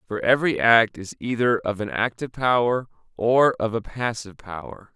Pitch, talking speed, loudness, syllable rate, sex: 115 Hz, 170 wpm, -22 LUFS, 5.2 syllables/s, male